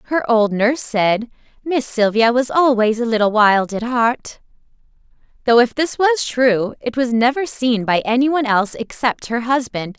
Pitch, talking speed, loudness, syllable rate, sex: 240 Hz, 170 wpm, -17 LUFS, 4.6 syllables/s, female